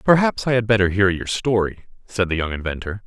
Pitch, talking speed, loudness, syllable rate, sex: 105 Hz, 215 wpm, -20 LUFS, 5.8 syllables/s, male